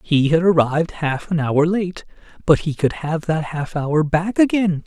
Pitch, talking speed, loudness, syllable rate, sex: 165 Hz, 195 wpm, -19 LUFS, 4.4 syllables/s, male